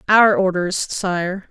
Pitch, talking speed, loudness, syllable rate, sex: 190 Hz, 120 wpm, -18 LUFS, 3.0 syllables/s, female